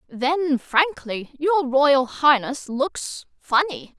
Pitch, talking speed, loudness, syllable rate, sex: 290 Hz, 90 wpm, -21 LUFS, 2.8 syllables/s, female